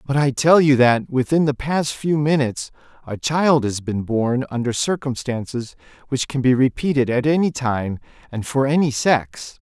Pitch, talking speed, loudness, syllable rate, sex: 135 Hz, 175 wpm, -19 LUFS, 4.6 syllables/s, male